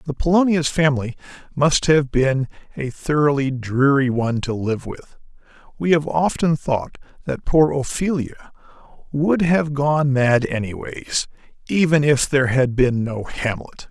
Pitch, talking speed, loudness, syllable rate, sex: 140 Hz, 140 wpm, -19 LUFS, 4.7 syllables/s, male